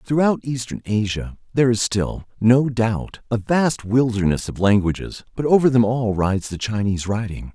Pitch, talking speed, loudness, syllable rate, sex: 115 Hz, 165 wpm, -20 LUFS, 4.9 syllables/s, male